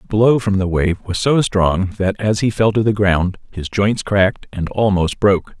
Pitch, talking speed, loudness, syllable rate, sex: 100 Hz, 225 wpm, -17 LUFS, 4.6 syllables/s, male